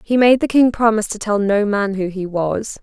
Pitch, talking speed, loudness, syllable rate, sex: 210 Hz, 255 wpm, -17 LUFS, 5.2 syllables/s, female